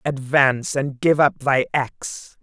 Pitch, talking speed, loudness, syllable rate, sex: 135 Hz, 150 wpm, -19 LUFS, 3.6 syllables/s, male